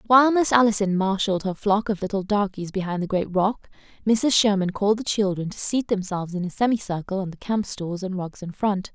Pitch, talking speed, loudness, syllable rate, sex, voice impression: 200 Hz, 215 wpm, -23 LUFS, 5.7 syllables/s, female, feminine, adult-like, tensed, powerful, bright, clear, fluent, slightly cute, friendly, lively, sharp